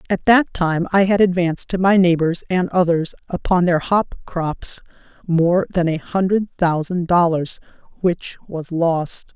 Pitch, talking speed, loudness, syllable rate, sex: 175 Hz, 155 wpm, -18 LUFS, 4.2 syllables/s, female